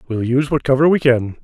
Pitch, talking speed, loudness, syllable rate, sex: 130 Hz, 250 wpm, -16 LUFS, 6.5 syllables/s, male